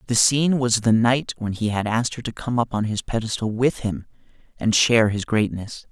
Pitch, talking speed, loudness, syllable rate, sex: 115 Hz, 225 wpm, -21 LUFS, 5.4 syllables/s, male